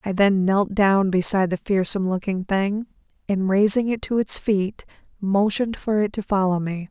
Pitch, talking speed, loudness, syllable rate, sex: 195 Hz, 180 wpm, -21 LUFS, 5.0 syllables/s, female